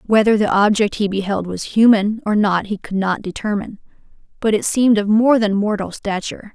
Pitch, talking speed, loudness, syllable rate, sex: 210 Hz, 190 wpm, -17 LUFS, 5.5 syllables/s, female